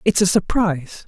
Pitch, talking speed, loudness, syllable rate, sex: 185 Hz, 165 wpm, -19 LUFS, 5.2 syllables/s, female